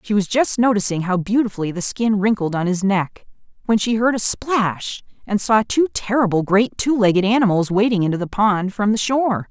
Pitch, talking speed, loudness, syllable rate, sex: 205 Hz, 200 wpm, -18 LUFS, 5.3 syllables/s, female